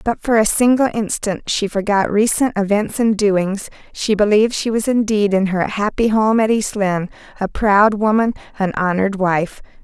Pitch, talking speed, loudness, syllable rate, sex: 210 Hz, 175 wpm, -17 LUFS, 4.8 syllables/s, female